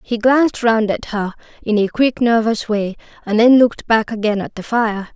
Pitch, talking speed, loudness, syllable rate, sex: 225 Hz, 210 wpm, -16 LUFS, 5.0 syllables/s, female